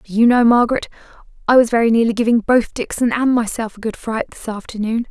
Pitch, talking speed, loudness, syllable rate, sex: 230 Hz, 210 wpm, -17 LUFS, 6.2 syllables/s, female